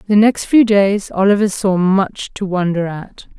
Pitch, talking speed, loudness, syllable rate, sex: 195 Hz, 175 wpm, -15 LUFS, 4.2 syllables/s, female